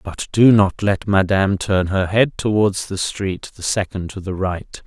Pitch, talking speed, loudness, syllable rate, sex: 100 Hz, 195 wpm, -18 LUFS, 4.3 syllables/s, male